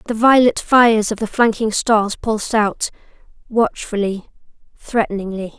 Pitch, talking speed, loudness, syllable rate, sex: 220 Hz, 105 wpm, -17 LUFS, 4.6 syllables/s, female